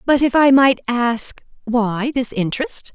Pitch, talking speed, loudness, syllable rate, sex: 250 Hz, 145 wpm, -17 LUFS, 4.0 syllables/s, female